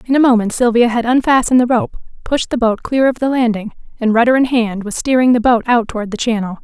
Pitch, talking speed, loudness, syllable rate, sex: 235 Hz, 245 wpm, -14 LUFS, 6.2 syllables/s, female